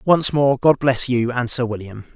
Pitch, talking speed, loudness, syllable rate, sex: 125 Hz, 225 wpm, -18 LUFS, 4.7 syllables/s, male